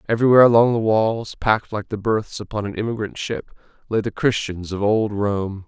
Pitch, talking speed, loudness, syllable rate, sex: 110 Hz, 190 wpm, -20 LUFS, 5.5 syllables/s, male